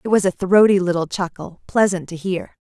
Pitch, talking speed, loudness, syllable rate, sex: 185 Hz, 205 wpm, -19 LUFS, 5.3 syllables/s, female